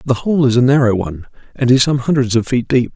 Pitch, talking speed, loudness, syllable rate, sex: 125 Hz, 265 wpm, -14 LUFS, 6.4 syllables/s, male